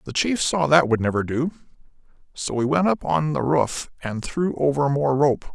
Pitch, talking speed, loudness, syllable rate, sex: 145 Hz, 205 wpm, -22 LUFS, 4.8 syllables/s, male